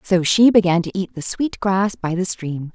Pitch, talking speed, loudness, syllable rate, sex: 185 Hz, 240 wpm, -18 LUFS, 4.5 syllables/s, female